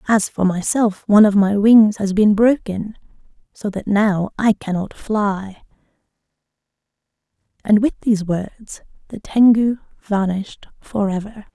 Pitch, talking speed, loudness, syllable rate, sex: 205 Hz, 120 wpm, -17 LUFS, 4.3 syllables/s, female